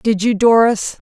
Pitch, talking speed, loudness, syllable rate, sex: 220 Hz, 170 wpm, -14 LUFS, 4.2 syllables/s, female